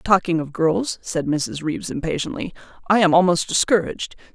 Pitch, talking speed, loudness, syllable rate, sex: 170 Hz, 150 wpm, -20 LUFS, 5.3 syllables/s, female